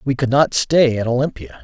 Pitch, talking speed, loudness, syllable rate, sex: 130 Hz, 220 wpm, -17 LUFS, 5.2 syllables/s, male